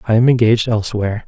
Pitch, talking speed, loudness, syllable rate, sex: 115 Hz, 190 wpm, -15 LUFS, 8.3 syllables/s, male